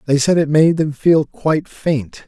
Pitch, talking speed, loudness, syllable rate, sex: 150 Hz, 210 wpm, -16 LUFS, 4.3 syllables/s, male